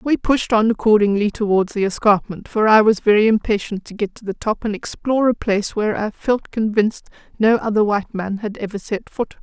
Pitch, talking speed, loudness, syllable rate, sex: 215 Hz, 210 wpm, -18 LUFS, 5.7 syllables/s, female